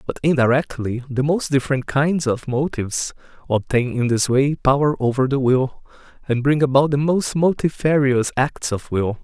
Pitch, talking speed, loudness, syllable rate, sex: 135 Hz, 160 wpm, -19 LUFS, 4.8 syllables/s, male